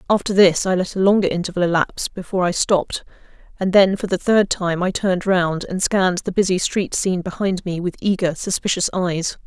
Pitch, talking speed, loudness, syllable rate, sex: 185 Hz, 205 wpm, -19 LUFS, 5.7 syllables/s, female